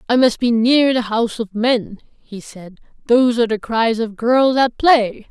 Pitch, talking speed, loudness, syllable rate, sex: 235 Hz, 205 wpm, -16 LUFS, 4.4 syllables/s, female